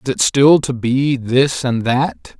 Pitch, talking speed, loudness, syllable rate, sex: 125 Hz, 200 wpm, -15 LUFS, 3.5 syllables/s, male